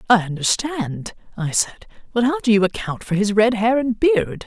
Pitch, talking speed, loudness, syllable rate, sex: 220 Hz, 200 wpm, -19 LUFS, 4.7 syllables/s, female